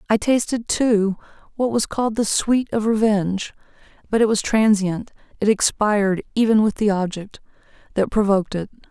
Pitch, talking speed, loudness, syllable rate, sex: 210 Hz, 150 wpm, -20 LUFS, 5.1 syllables/s, female